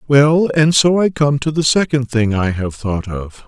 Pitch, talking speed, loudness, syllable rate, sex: 135 Hz, 225 wpm, -15 LUFS, 4.2 syllables/s, male